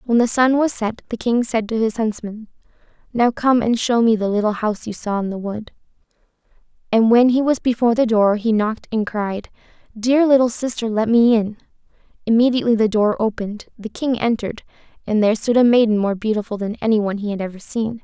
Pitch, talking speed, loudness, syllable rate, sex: 225 Hz, 205 wpm, -18 LUFS, 5.9 syllables/s, female